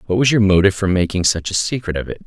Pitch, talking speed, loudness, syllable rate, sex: 95 Hz, 290 wpm, -17 LUFS, 7.2 syllables/s, male